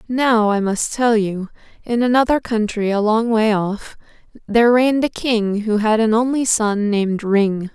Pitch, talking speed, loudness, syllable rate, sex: 220 Hz, 180 wpm, -17 LUFS, 4.5 syllables/s, female